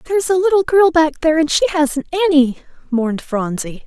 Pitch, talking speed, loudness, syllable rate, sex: 310 Hz, 185 wpm, -16 LUFS, 6.2 syllables/s, female